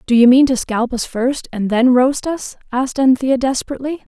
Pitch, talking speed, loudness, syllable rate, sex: 255 Hz, 200 wpm, -16 LUFS, 5.3 syllables/s, female